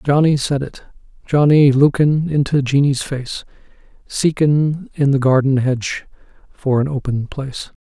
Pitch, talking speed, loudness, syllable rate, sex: 140 Hz, 130 wpm, -17 LUFS, 4.4 syllables/s, male